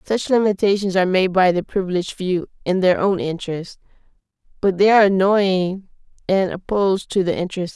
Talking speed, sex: 185 wpm, female